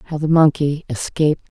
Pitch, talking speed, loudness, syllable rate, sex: 150 Hz, 160 wpm, -18 LUFS, 5.0 syllables/s, female